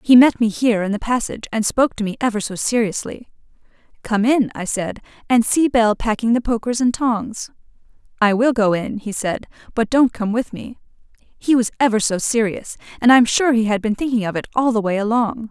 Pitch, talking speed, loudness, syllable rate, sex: 230 Hz, 215 wpm, -18 LUFS, 5.5 syllables/s, female